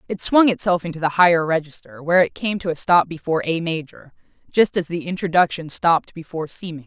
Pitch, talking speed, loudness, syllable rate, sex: 170 Hz, 210 wpm, -20 LUFS, 6.3 syllables/s, female